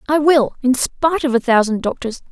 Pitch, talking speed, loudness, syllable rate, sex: 260 Hz, 210 wpm, -16 LUFS, 5.5 syllables/s, female